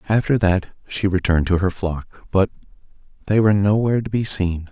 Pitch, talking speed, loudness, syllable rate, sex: 95 Hz, 180 wpm, -20 LUFS, 5.9 syllables/s, male